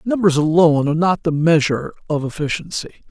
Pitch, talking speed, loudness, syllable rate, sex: 160 Hz, 155 wpm, -17 LUFS, 6.4 syllables/s, male